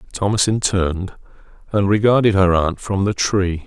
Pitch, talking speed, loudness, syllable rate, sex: 100 Hz, 145 wpm, -18 LUFS, 4.8 syllables/s, male